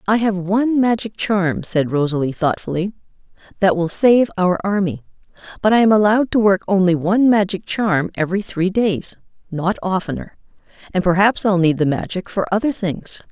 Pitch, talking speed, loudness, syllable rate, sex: 190 Hz, 160 wpm, -18 LUFS, 5.3 syllables/s, female